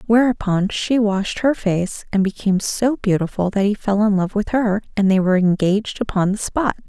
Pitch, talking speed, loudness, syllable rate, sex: 205 Hz, 200 wpm, -19 LUFS, 5.2 syllables/s, female